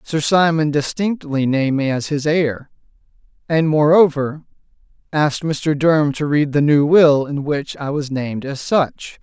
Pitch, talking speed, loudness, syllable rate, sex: 150 Hz, 165 wpm, -17 LUFS, 4.5 syllables/s, male